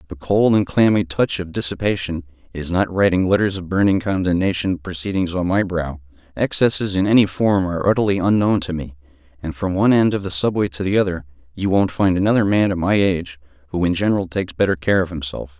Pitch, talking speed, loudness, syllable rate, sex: 90 Hz, 205 wpm, -19 LUFS, 6.1 syllables/s, male